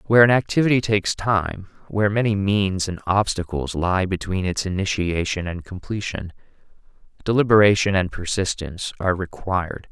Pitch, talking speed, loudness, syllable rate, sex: 95 Hz, 125 wpm, -21 LUFS, 5.4 syllables/s, male